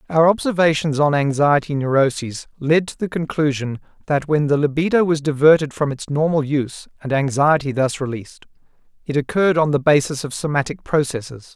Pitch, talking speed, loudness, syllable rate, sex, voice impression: 145 Hz, 160 wpm, -19 LUFS, 5.6 syllables/s, male, masculine, adult-like, tensed, powerful, soft, clear, cool, intellectual, calm, friendly, reassuring, wild, lively, slightly modest